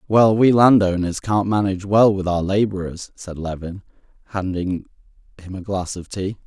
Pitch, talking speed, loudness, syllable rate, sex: 95 Hz, 160 wpm, -19 LUFS, 4.9 syllables/s, male